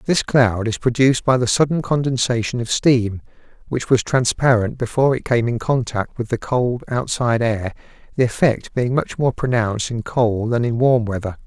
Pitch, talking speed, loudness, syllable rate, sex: 120 Hz, 185 wpm, -19 LUFS, 5.0 syllables/s, male